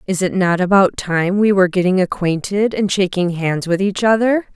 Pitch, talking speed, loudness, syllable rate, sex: 190 Hz, 200 wpm, -16 LUFS, 5.1 syllables/s, female